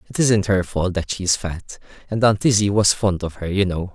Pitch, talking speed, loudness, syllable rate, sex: 95 Hz, 245 wpm, -19 LUFS, 4.9 syllables/s, male